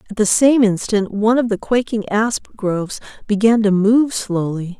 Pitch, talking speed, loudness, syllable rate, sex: 215 Hz, 175 wpm, -17 LUFS, 4.7 syllables/s, female